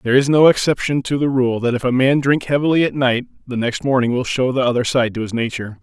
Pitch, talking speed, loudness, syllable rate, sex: 130 Hz, 270 wpm, -17 LUFS, 6.4 syllables/s, male